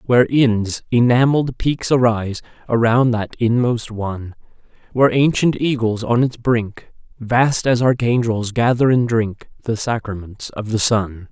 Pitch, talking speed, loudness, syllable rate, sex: 115 Hz, 140 wpm, -17 LUFS, 4.4 syllables/s, male